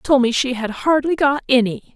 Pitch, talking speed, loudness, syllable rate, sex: 260 Hz, 215 wpm, -18 LUFS, 5.2 syllables/s, female